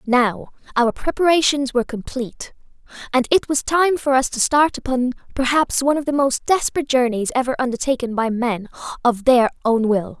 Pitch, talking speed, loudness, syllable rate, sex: 255 Hz, 170 wpm, -19 LUFS, 5.5 syllables/s, female